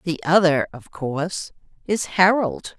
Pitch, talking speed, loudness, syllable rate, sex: 170 Hz, 130 wpm, -21 LUFS, 4.0 syllables/s, female